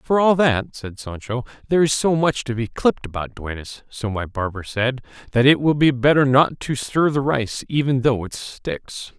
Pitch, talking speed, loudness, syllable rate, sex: 125 Hz, 205 wpm, -20 LUFS, 4.7 syllables/s, male